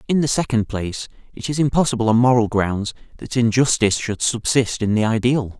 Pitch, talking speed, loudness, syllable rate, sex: 115 Hz, 180 wpm, -19 LUFS, 5.7 syllables/s, male